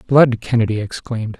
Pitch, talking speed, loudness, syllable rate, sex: 115 Hz, 130 wpm, -18 LUFS, 5.7 syllables/s, male